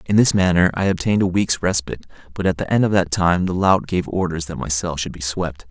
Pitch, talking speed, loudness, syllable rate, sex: 90 Hz, 265 wpm, -19 LUFS, 6.0 syllables/s, male